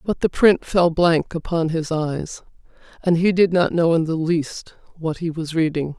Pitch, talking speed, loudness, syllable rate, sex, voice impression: 165 Hz, 200 wpm, -20 LUFS, 4.4 syllables/s, female, gender-neutral, slightly old, relaxed, weak, slightly dark, halting, raspy, calm, reassuring, kind, modest